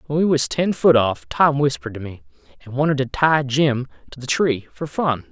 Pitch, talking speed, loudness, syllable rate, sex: 135 Hz, 225 wpm, -19 LUFS, 5.2 syllables/s, male